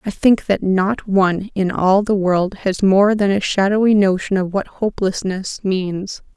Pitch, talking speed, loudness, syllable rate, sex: 195 Hz, 180 wpm, -17 LUFS, 4.3 syllables/s, female